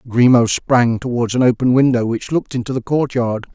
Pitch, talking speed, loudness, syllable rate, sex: 125 Hz, 185 wpm, -16 LUFS, 5.4 syllables/s, male